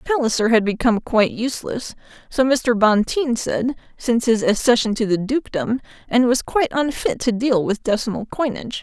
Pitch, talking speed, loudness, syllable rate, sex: 235 Hz, 150 wpm, -19 LUFS, 5.5 syllables/s, female